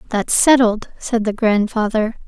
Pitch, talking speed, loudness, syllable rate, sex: 220 Hz, 130 wpm, -16 LUFS, 4.2 syllables/s, female